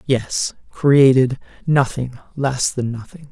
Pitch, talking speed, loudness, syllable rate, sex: 130 Hz, 90 wpm, -18 LUFS, 3.5 syllables/s, male